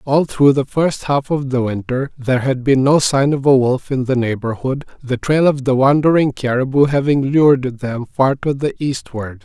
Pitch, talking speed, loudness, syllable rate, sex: 135 Hz, 205 wpm, -16 LUFS, 4.8 syllables/s, male